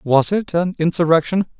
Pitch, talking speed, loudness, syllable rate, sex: 170 Hz, 150 wpm, -18 LUFS, 4.8 syllables/s, male